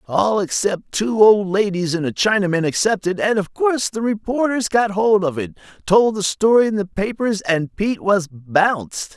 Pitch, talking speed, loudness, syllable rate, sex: 200 Hz, 185 wpm, -18 LUFS, 4.8 syllables/s, male